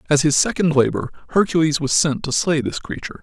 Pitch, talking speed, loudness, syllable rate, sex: 150 Hz, 205 wpm, -19 LUFS, 6.1 syllables/s, male